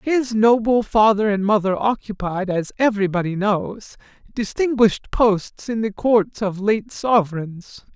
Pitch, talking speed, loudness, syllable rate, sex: 210 Hz, 130 wpm, -19 LUFS, 4.2 syllables/s, male